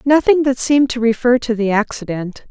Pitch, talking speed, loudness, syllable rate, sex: 240 Hz, 190 wpm, -16 LUFS, 5.4 syllables/s, female